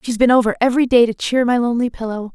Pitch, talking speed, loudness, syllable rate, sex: 235 Hz, 255 wpm, -16 LUFS, 7.1 syllables/s, female